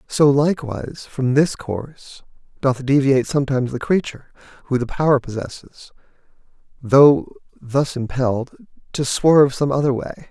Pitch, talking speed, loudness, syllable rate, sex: 135 Hz, 130 wpm, -18 LUFS, 5.0 syllables/s, male